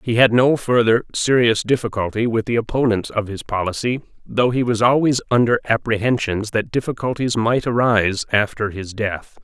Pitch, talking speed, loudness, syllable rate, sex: 115 Hz, 160 wpm, -19 LUFS, 5.0 syllables/s, male